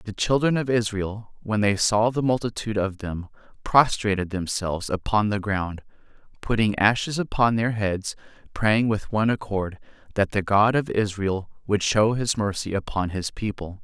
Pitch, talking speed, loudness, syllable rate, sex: 105 Hz, 165 wpm, -24 LUFS, 4.8 syllables/s, male